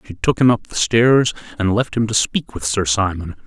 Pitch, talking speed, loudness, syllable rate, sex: 105 Hz, 240 wpm, -17 LUFS, 5.0 syllables/s, male